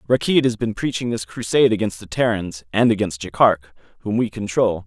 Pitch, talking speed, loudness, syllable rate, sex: 105 Hz, 185 wpm, -20 LUFS, 5.5 syllables/s, male